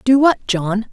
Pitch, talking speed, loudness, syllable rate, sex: 230 Hz, 195 wpm, -16 LUFS, 3.8 syllables/s, female